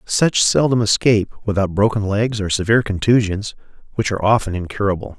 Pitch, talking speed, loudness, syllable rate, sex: 105 Hz, 150 wpm, -18 LUFS, 6.0 syllables/s, male